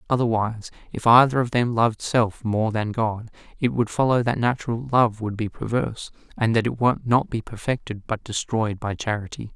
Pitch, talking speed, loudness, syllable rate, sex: 115 Hz, 190 wpm, -23 LUFS, 5.2 syllables/s, male